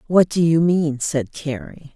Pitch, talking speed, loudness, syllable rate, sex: 155 Hz, 185 wpm, -19 LUFS, 4.0 syllables/s, female